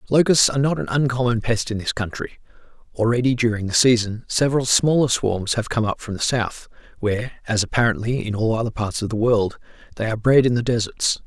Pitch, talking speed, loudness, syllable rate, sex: 115 Hz, 200 wpm, -20 LUFS, 6.0 syllables/s, male